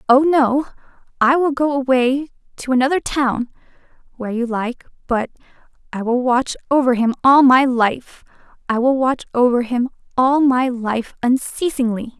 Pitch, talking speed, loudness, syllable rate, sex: 255 Hz, 135 wpm, -17 LUFS, 4.6 syllables/s, female